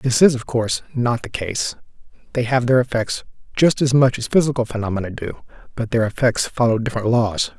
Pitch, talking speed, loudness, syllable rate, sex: 120 Hz, 190 wpm, -19 LUFS, 5.7 syllables/s, male